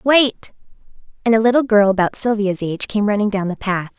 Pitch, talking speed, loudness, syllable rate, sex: 210 Hz, 195 wpm, -17 LUFS, 5.7 syllables/s, female